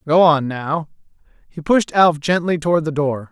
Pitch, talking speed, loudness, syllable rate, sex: 160 Hz, 180 wpm, -17 LUFS, 4.7 syllables/s, male